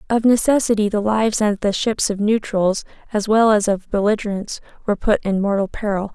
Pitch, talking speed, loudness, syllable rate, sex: 210 Hz, 185 wpm, -19 LUFS, 5.5 syllables/s, female